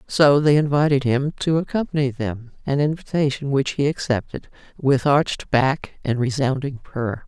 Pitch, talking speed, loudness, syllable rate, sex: 140 Hz, 150 wpm, -21 LUFS, 4.7 syllables/s, female